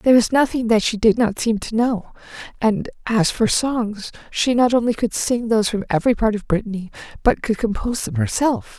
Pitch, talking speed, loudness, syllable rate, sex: 225 Hz, 205 wpm, -19 LUFS, 5.4 syllables/s, female